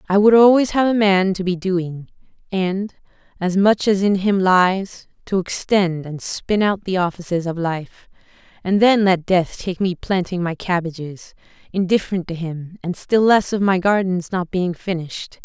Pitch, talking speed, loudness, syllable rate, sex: 185 Hz, 180 wpm, -19 LUFS, 4.4 syllables/s, female